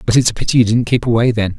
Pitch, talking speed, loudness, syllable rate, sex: 115 Hz, 340 wpm, -14 LUFS, 7.4 syllables/s, male